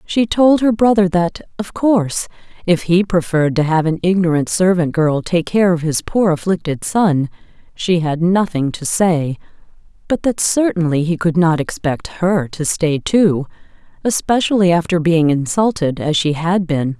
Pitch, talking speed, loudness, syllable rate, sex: 175 Hz, 165 wpm, -16 LUFS, 4.5 syllables/s, female